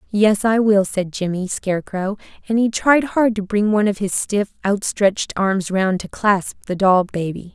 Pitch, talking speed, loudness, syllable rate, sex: 200 Hz, 190 wpm, -19 LUFS, 4.7 syllables/s, female